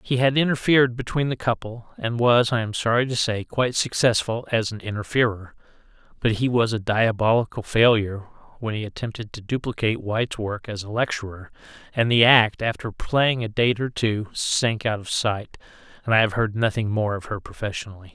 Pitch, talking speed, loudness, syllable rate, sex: 115 Hz, 180 wpm, -22 LUFS, 5.2 syllables/s, male